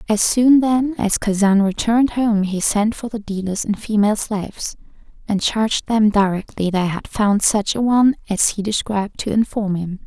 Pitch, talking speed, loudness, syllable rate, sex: 210 Hz, 185 wpm, -18 LUFS, 4.9 syllables/s, female